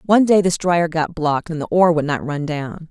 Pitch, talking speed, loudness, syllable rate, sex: 165 Hz, 270 wpm, -18 LUFS, 5.8 syllables/s, female